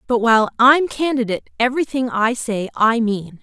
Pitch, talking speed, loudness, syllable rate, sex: 240 Hz, 160 wpm, -17 LUFS, 5.3 syllables/s, female